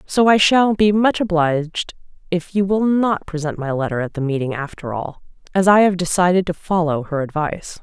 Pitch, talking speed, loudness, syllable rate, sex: 175 Hz, 200 wpm, -18 LUFS, 5.3 syllables/s, female